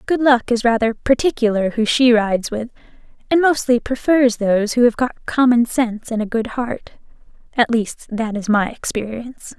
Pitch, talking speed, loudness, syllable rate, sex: 235 Hz, 175 wpm, -18 LUFS, 5.0 syllables/s, female